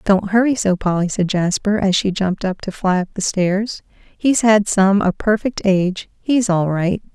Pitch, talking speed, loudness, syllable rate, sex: 195 Hz, 185 wpm, -17 LUFS, 4.5 syllables/s, female